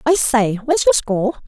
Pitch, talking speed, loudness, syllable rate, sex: 240 Hz, 245 wpm, -16 LUFS, 6.1 syllables/s, female